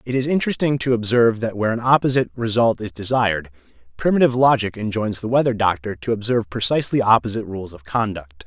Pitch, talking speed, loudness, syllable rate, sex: 115 Hz, 175 wpm, -19 LUFS, 6.7 syllables/s, male